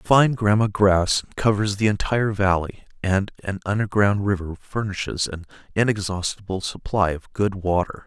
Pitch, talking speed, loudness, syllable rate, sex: 100 Hz, 135 wpm, -22 LUFS, 4.7 syllables/s, male